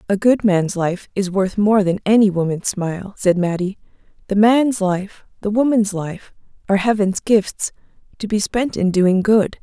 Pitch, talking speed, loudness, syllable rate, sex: 200 Hz, 175 wpm, -18 LUFS, 4.5 syllables/s, female